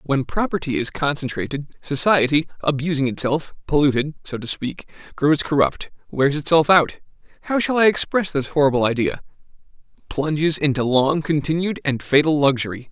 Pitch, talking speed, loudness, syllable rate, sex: 150 Hz, 130 wpm, -20 LUFS, 5.2 syllables/s, male